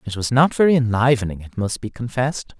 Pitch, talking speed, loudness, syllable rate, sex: 120 Hz, 210 wpm, -19 LUFS, 6.1 syllables/s, male